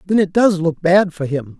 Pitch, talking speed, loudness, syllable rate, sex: 170 Hz, 265 wpm, -16 LUFS, 4.7 syllables/s, male